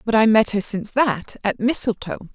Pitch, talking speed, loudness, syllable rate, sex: 220 Hz, 205 wpm, -20 LUFS, 5.0 syllables/s, female